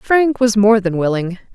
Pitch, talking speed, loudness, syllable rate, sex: 215 Hz, 195 wpm, -15 LUFS, 4.4 syllables/s, female